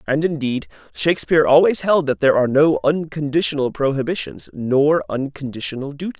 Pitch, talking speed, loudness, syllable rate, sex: 145 Hz, 135 wpm, -18 LUFS, 5.8 syllables/s, male